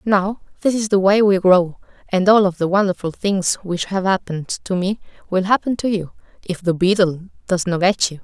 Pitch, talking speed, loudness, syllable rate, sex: 190 Hz, 205 wpm, -18 LUFS, 5.2 syllables/s, female